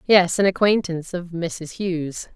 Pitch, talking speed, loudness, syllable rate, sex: 175 Hz, 155 wpm, -22 LUFS, 4.5 syllables/s, female